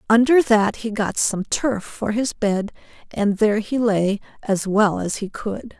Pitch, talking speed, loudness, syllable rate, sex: 215 Hz, 185 wpm, -20 LUFS, 4.0 syllables/s, female